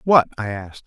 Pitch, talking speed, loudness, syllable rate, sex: 120 Hz, 205 wpm, -20 LUFS, 6.0 syllables/s, male